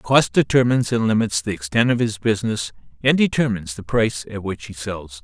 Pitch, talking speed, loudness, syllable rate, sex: 110 Hz, 195 wpm, -20 LUFS, 5.8 syllables/s, male